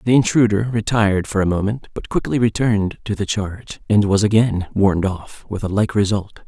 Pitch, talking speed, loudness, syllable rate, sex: 105 Hz, 195 wpm, -19 LUFS, 5.4 syllables/s, male